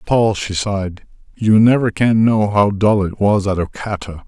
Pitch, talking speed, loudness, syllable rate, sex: 100 Hz, 180 wpm, -16 LUFS, 4.5 syllables/s, male